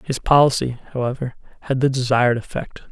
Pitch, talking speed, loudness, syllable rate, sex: 130 Hz, 145 wpm, -20 LUFS, 6.1 syllables/s, male